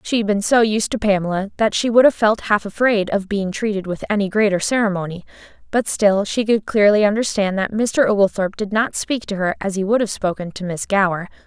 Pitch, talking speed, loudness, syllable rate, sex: 205 Hz, 225 wpm, -18 LUFS, 5.7 syllables/s, female